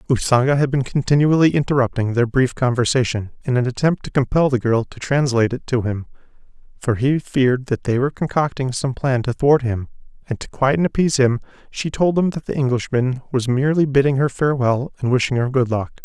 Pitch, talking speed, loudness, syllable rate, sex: 130 Hz, 200 wpm, -19 LUFS, 5.9 syllables/s, male